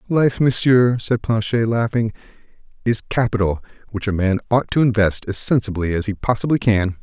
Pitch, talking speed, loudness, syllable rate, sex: 110 Hz, 160 wpm, -19 LUFS, 5.3 syllables/s, male